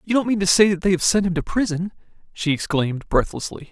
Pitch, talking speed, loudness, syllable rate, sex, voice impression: 185 Hz, 240 wpm, -20 LUFS, 6.3 syllables/s, male, masculine, adult-like, fluent, refreshing, slightly sincere, slightly reassuring